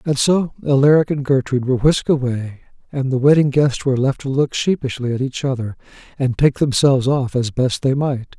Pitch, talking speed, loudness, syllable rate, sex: 135 Hz, 200 wpm, -17 LUFS, 5.6 syllables/s, male